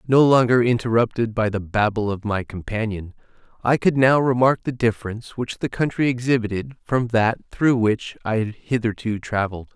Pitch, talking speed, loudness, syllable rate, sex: 115 Hz, 165 wpm, -21 LUFS, 5.2 syllables/s, male